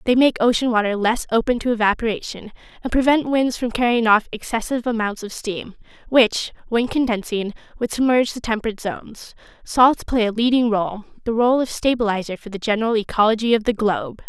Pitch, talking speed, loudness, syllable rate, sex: 230 Hz, 175 wpm, -20 LUFS, 5.8 syllables/s, female